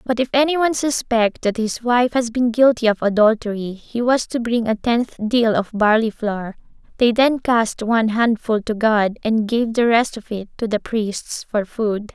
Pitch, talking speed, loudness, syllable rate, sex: 230 Hz, 205 wpm, -19 LUFS, 4.5 syllables/s, female